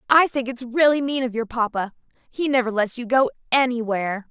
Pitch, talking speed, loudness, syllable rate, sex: 245 Hz, 195 wpm, -21 LUFS, 5.6 syllables/s, female